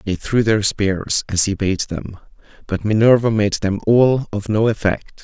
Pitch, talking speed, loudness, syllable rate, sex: 105 Hz, 185 wpm, -17 LUFS, 4.2 syllables/s, male